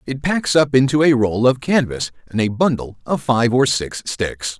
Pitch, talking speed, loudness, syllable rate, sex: 125 Hz, 210 wpm, -18 LUFS, 4.5 syllables/s, male